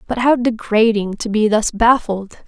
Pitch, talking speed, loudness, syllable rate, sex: 220 Hz, 170 wpm, -16 LUFS, 4.6 syllables/s, female